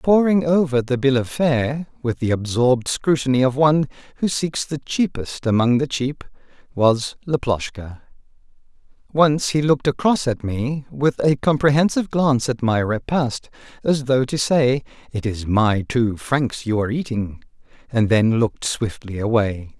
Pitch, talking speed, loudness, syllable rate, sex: 130 Hz, 155 wpm, -20 LUFS, 4.5 syllables/s, male